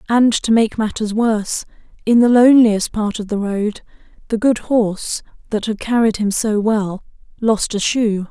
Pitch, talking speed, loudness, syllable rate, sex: 220 Hz, 175 wpm, -17 LUFS, 4.6 syllables/s, female